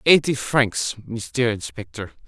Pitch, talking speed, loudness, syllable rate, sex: 115 Hz, 105 wpm, -22 LUFS, 3.7 syllables/s, male